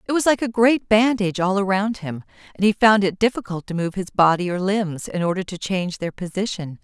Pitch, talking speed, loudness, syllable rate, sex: 195 Hz, 230 wpm, -20 LUFS, 5.6 syllables/s, female